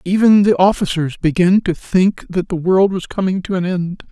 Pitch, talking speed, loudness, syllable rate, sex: 185 Hz, 205 wpm, -16 LUFS, 4.8 syllables/s, male